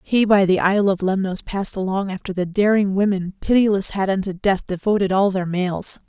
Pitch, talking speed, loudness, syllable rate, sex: 195 Hz, 195 wpm, -19 LUFS, 5.4 syllables/s, female